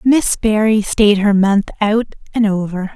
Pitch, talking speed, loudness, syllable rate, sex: 210 Hz, 160 wpm, -15 LUFS, 4.1 syllables/s, female